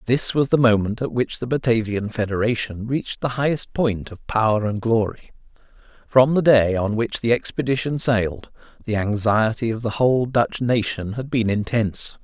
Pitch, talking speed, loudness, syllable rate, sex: 115 Hz, 170 wpm, -21 LUFS, 5.1 syllables/s, male